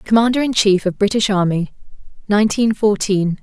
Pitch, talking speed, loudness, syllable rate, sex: 205 Hz, 140 wpm, -16 LUFS, 5.4 syllables/s, female